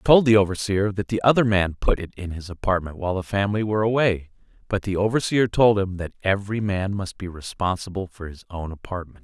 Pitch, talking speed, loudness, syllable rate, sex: 100 Hz, 215 wpm, -23 LUFS, 6.1 syllables/s, male